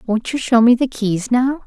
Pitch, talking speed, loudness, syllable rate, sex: 240 Hz, 250 wpm, -16 LUFS, 4.7 syllables/s, female